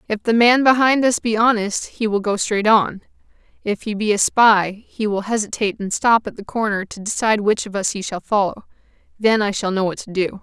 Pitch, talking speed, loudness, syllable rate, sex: 210 Hz, 230 wpm, -18 LUFS, 5.4 syllables/s, female